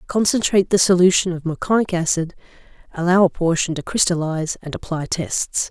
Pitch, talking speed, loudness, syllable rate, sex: 175 Hz, 145 wpm, -19 LUFS, 5.7 syllables/s, female